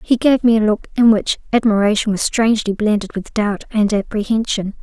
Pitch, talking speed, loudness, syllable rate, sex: 215 Hz, 185 wpm, -16 LUFS, 5.5 syllables/s, female